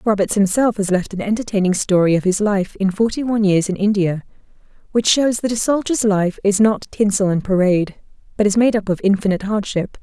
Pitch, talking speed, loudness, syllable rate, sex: 200 Hz, 205 wpm, -17 LUFS, 5.8 syllables/s, female